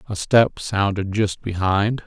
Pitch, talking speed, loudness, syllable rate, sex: 105 Hz, 145 wpm, -20 LUFS, 3.7 syllables/s, male